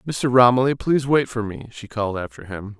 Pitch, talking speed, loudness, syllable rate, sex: 115 Hz, 215 wpm, -20 LUFS, 5.8 syllables/s, male